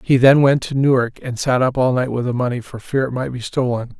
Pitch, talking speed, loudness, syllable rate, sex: 125 Hz, 285 wpm, -18 LUFS, 5.7 syllables/s, male